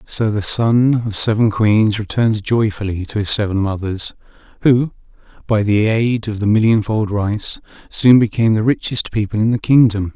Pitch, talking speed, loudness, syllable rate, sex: 110 Hz, 165 wpm, -16 LUFS, 4.8 syllables/s, male